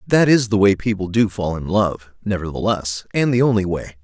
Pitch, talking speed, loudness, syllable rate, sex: 100 Hz, 210 wpm, -19 LUFS, 5.1 syllables/s, male